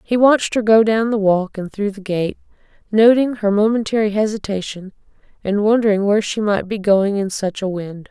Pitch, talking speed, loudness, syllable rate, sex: 210 Hz, 190 wpm, -17 LUFS, 5.3 syllables/s, female